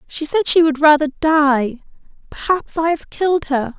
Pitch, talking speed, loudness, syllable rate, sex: 300 Hz, 175 wpm, -16 LUFS, 4.5 syllables/s, female